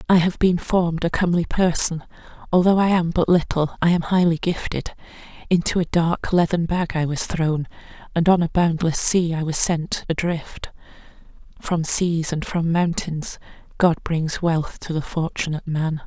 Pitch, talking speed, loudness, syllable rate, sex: 170 Hz, 170 wpm, -21 LUFS, 4.7 syllables/s, female